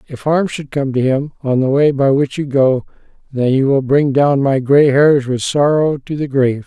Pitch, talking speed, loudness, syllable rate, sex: 140 Hz, 235 wpm, -14 LUFS, 4.7 syllables/s, male